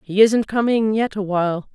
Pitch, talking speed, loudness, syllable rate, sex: 205 Hz, 170 wpm, -19 LUFS, 4.9 syllables/s, female